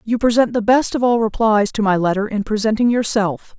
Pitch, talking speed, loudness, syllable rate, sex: 220 Hz, 220 wpm, -17 LUFS, 5.4 syllables/s, female